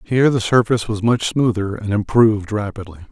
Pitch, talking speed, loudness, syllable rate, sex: 110 Hz, 175 wpm, -18 LUFS, 5.8 syllables/s, male